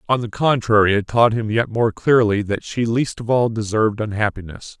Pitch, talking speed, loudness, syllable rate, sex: 110 Hz, 200 wpm, -18 LUFS, 5.2 syllables/s, male